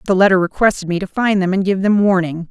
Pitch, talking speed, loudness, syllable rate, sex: 190 Hz, 265 wpm, -15 LUFS, 6.4 syllables/s, female